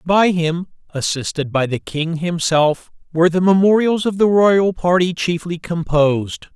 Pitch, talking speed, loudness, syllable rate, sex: 170 Hz, 145 wpm, -17 LUFS, 4.3 syllables/s, male